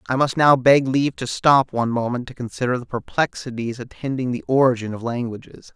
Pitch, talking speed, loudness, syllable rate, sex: 125 Hz, 190 wpm, -20 LUFS, 5.8 syllables/s, male